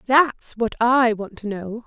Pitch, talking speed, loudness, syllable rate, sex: 230 Hz, 195 wpm, -21 LUFS, 3.7 syllables/s, female